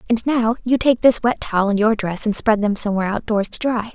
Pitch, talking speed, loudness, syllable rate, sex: 220 Hz, 260 wpm, -18 LUFS, 6.0 syllables/s, female